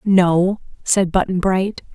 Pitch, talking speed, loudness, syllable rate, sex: 185 Hz, 125 wpm, -18 LUFS, 3.3 syllables/s, female